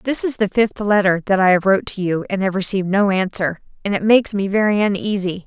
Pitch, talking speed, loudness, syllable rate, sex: 195 Hz, 240 wpm, -18 LUFS, 6.0 syllables/s, female